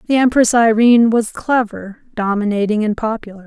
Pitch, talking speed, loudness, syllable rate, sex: 220 Hz, 140 wpm, -15 LUFS, 5.3 syllables/s, female